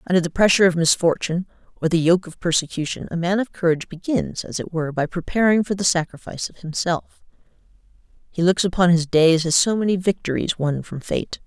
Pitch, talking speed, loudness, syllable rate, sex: 175 Hz, 195 wpm, -20 LUFS, 6.0 syllables/s, female